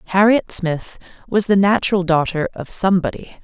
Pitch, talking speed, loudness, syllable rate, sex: 190 Hz, 140 wpm, -17 LUFS, 5.5 syllables/s, female